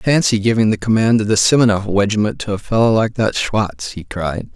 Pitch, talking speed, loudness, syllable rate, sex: 110 Hz, 210 wpm, -16 LUFS, 5.3 syllables/s, male